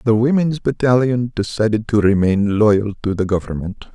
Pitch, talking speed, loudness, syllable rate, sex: 110 Hz, 150 wpm, -17 LUFS, 4.8 syllables/s, male